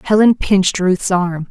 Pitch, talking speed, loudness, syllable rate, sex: 190 Hz, 160 wpm, -14 LUFS, 4.3 syllables/s, female